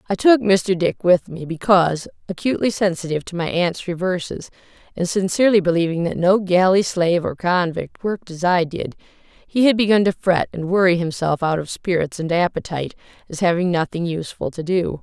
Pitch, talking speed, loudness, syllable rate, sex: 180 Hz, 180 wpm, -19 LUFS, 5.5 syllables/s, female